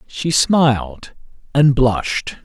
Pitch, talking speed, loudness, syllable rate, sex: 130 Hz, 100 wpm, -16 LUFS, 3.2 syllables/s, male